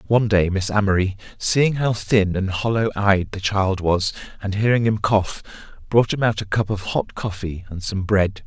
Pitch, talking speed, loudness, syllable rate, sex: 100 Hz, 200 wpm, -21 LUFS, 4.7 syllables/s, male